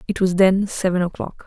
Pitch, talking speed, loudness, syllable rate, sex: 185 Hz, 205 wpm, -19 LUFS, 5.3 syllables/s, female